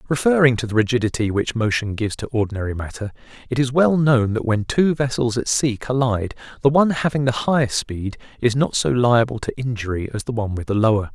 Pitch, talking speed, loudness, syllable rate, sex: 120 Hz, 210 wpm, -20 LUFS, 6.1 syllables/s, male